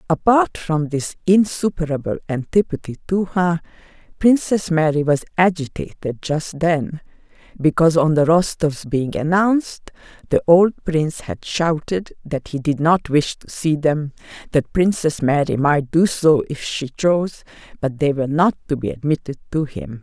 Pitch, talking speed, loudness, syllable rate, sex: 160 Hz, 150 wpm, -19 LUFS, 4.6 syllables/s, female